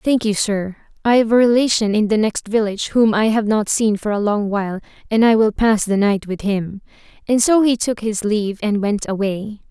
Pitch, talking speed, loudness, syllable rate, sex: 215 Hz, 225 wpm, -17 LUFS, 5.3 syllables/s, female